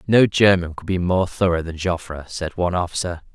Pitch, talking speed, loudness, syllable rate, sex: 90 Hz, 195 wpm, -20 LUFS, 5.7 syllables/s, male